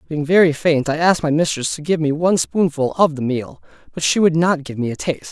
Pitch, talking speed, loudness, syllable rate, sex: 155 Hz, 260 wpm, -18 LUFS, 6.0 syllables/s, male